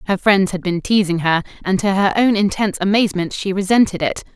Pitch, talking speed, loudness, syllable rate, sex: 195 Hz, 205 wpm, -17 LUFS, 6.1 syllables/s, female